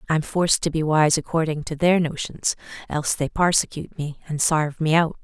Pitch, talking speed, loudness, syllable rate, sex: 155 Hz, 195 wpm, -22 LUFS, 5.7 syllables/s, female